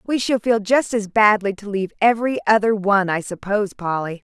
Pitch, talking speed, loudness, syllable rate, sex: 205 Hz, 195 wpm, -19 LUFS, 5.8 syllables/s, female